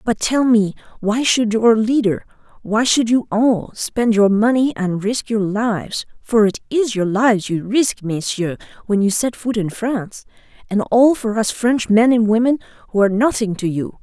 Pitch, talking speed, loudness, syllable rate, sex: 220 Hz, 175 wpm, -17 LUFS, 4.5 syllables/s, female